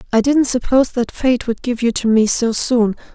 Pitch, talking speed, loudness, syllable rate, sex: 240 Hz, 230 wpm, -16 LUFS, 5.2 syllables/s, female